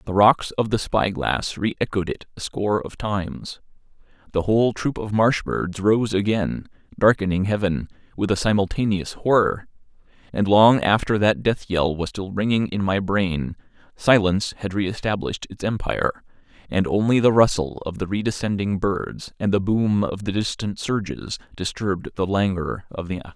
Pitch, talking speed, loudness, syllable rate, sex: 100 Hz, 165 wpm, -22 LUFS, 5.0 syllables/s, male